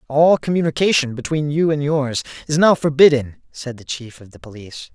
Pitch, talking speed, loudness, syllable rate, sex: 140 Hz, 180 wpm, -17 LUFS, 5.4 syllables/s, male